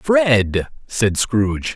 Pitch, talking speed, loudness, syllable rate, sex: 125 Hz, 100 wpm, -18 LUFS, 2.6 syllables/s, male